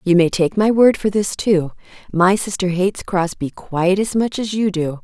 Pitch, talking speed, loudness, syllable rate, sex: 190 Hz, 205 wpm, -18 LUFS, 4.9 syllables/s, female